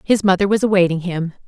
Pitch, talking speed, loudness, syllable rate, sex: 185 Hz, 205 wpm, -17 LUFS, 6.4 syllables/s, female